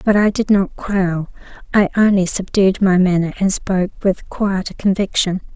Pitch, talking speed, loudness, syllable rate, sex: 190 Hz, 160 wpm, -17 LUFS, 4.7 syllables/s, female